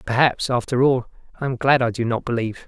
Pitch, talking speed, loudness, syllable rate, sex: 125 Hz, 225 wpm, -21 LUFS, 6.0 syllables/s, male